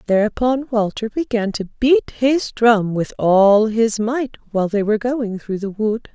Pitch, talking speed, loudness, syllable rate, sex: 225 Hz, 175 wpm, -18 LUFS, 4.2 syllables/s, female